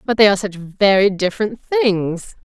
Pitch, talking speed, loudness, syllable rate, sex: 205 Hz, 165 wpm, -17 LUFS, 4.8 syllables/s, female